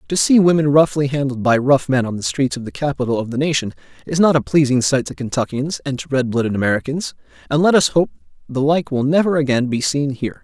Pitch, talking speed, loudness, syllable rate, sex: 140 Hz, 235 wpm, -17 LUFS, 6.2 syllables/s, male